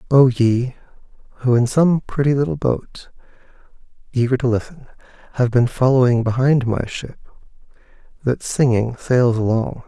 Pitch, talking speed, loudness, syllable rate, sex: 125 Hz, 130 wpm, -18 LUFS, 4.7 syllables/s, male